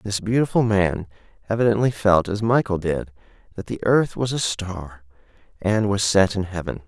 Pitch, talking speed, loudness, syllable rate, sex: 100 Hz, 165 wpm, -21 LUFS, 4.8 syllables/s, male